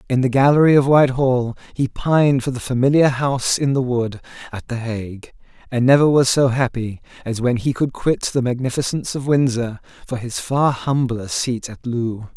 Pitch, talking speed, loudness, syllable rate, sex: 125 Hz, 185 wpm, -18 LUFS, 5.1 syllables/s, male